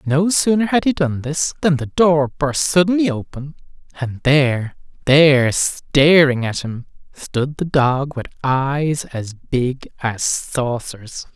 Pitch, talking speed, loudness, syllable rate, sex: 145 Hz, 145 wpm, -17 LUFS, 3.6 syllables/s, male